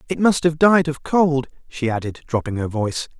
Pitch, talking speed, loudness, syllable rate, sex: 140 Hz, 205 wpm, -20 LUFS, 5.3 syllables/s, male